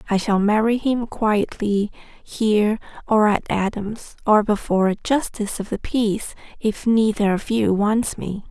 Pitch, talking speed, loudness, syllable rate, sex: 210 Hz, 155 wpm, -21 LUFS, 4.4 syllables/s, female